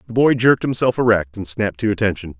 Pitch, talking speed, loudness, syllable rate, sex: 110 Hz, 225 wpm, -18 LUFS, 6.8 syllables/s, male